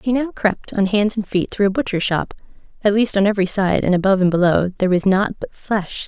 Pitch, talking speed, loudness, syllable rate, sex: 200 Hz, 245 wpm, -18 LUFS, 6.0 syllables/s, female